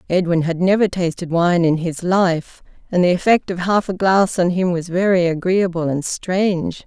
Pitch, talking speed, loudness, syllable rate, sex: 180 Hz, 190 wpm, -18 LUFS, 4.7 syllables/s, female